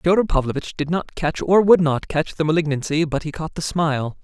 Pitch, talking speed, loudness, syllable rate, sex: 160 Hz, 225 wpm, -20 LUFS, 5.5 syllables/s, male